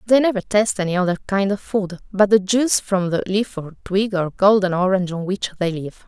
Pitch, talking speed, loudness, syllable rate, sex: 195 Hz, 225 wpm, -19 LUFS, 5.6 syllables/s, female